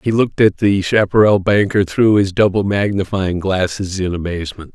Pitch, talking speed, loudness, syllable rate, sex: 100 Hz, 165 wpm, -15 LUFS, 5.2 syllables/s, male